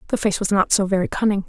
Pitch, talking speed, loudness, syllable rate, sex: 195 Hz, 285 wpm, -20 LUFS, 7.2 syllables/s, female